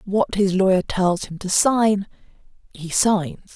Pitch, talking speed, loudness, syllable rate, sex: 195 Hz, 150 wpm, -20 LUFS, 3.7 syllables/s, female